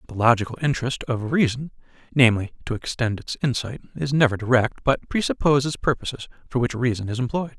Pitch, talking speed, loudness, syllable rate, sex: 125 Hz, 165 wpm, -23 LUFS, 5.1 syllables/s, male